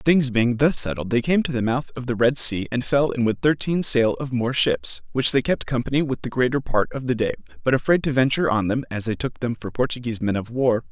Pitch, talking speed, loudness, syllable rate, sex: 125 Hz, 265 wpm, -22 LUFS, 5.8 syllables/s, male